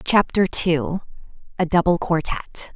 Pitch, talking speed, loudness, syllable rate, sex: 175 Hz, 85 wpm, -21 LUFS, 4.4 syllables/s, female